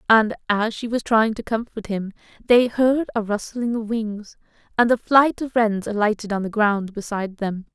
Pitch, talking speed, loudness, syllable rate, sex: 220 Hz, 195 wpm, -21 LUFS, 4.7 syllables/s, female